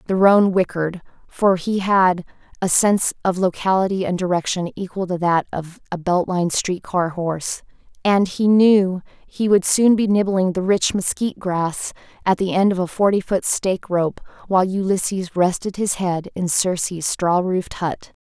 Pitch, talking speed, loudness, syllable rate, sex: 185 Hz, 175 wpm, -19 LUFS, 4.7 syllables/s, female